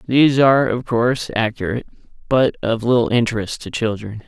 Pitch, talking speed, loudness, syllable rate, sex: 120 Hz, 155 wpm, -18 LUFS, 5.8 syllables/s, male